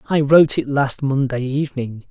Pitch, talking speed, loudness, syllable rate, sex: 135 Hz, 170 wpm, -18 LUFS, 5.3 syllables/s, male